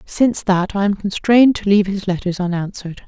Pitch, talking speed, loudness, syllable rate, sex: 195 Hz, 195 wpm, -17 LUFS, 6.1 syllables/s, female